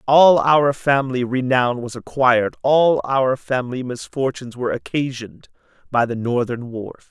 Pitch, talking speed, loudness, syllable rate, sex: 130 Hz, 120 wpm, -19 LUFS, 4.8 syllables/s, male